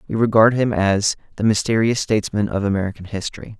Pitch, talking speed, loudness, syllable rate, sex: 105 Hz, 165 wpm, -19 LUFS, 6.2 syllables/s, male